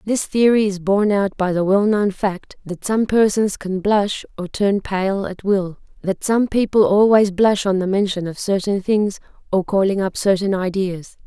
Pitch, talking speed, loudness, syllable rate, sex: 195 Hz, 185 wpm, -18 LUFS, 4.5 syllables/s, female